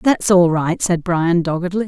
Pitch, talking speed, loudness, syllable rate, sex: 175 Hz, 195 wpm, -16 LUFS, 4.4 syllables/s, female